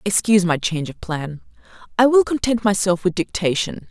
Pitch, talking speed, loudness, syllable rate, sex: 195 Hz, 170 wpm, -19 LUFS, 5.5 syllables/s, female